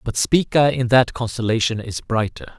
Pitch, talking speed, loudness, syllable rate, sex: 120 Hz, 160 wpm, -19 LUFS, 4.9 syllables/s, male